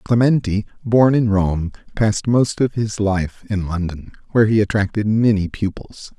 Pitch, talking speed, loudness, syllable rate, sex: 105 Hz, 155 wpm, -18 LUFS, 4.6 syllables/s, male